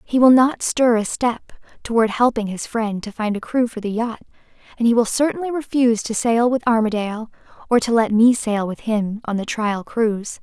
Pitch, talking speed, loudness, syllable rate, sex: 230 Hz, 215 wpm, -19 LUFS, 5.3 syllables/s, female